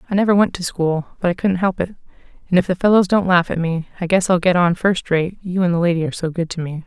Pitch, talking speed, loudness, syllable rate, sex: 180 Hz, 295 wpm, -18 LUFS, 6.5 syllables/s, female